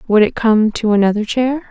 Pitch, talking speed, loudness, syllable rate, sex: 225 Hz, 210 wpm, -14 LUFS, 5.2 syllables/s, female